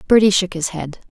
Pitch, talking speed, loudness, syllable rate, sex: 185 Hz, 215 wpm, -17 LUFS, 5.8 syllables/s, female